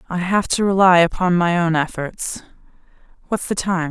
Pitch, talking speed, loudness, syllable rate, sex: 180 Hz, 170 wpm, -18 LUFS, 4.4 syllables/s, female